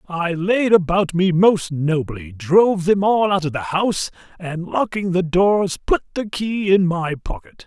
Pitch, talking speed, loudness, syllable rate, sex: 180 Hz, 180 wpm, -18 LUFS, 4.1 syllables/s, male